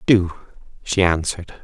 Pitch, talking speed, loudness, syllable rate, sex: 90 Hz, 110 wpm, -20 LUFS, 5.0 syllables/s, male